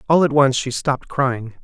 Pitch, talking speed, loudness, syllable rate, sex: 135 Hz, 220 wpm, -18 LUFS, 5.1 syllables/s, male